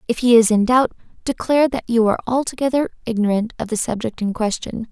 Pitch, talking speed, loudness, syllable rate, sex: 235 Hz, 195 wpm, -19 LUFS, 6.4 syllables/s, female